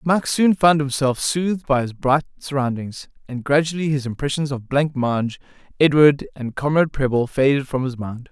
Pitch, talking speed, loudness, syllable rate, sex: 140 Hz, 165 wpm, -20 LUFS, 5.1 syllables/s, male